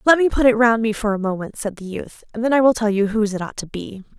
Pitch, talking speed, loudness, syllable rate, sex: 220 Hz, 330 wpm, -19 LUFS, 6.5 syllables/s, female